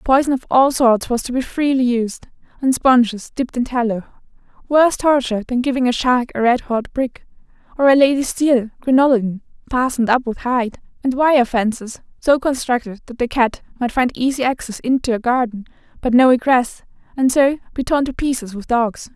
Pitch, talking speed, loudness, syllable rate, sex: 250 Hz, 180 wpm, -17 LUFS, 5.4 syllables/s, female